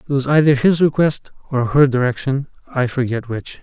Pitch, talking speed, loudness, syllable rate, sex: 135 Hz, 180 wpm, -17 LUFS, 5.1 syllables/s, male